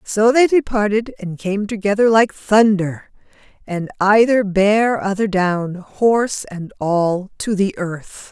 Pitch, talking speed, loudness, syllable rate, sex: 205 Hz, 135 wpm, -17 LUFS, 3.6 syllables/s, female